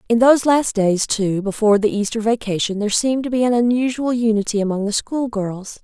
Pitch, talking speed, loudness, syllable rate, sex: 225 Hz, 195 wpm, -18 LUFS, 5.9 syllables/s, female